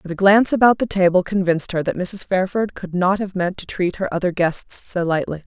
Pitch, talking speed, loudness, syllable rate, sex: 185 Hz, 235 wpm, -19 LUFS, 5.6 syllables/s, female